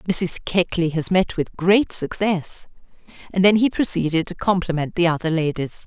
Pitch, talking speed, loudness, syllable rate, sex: 175 Hz, 165 wpm, -20 LUFS, 4.9 syllables/s, female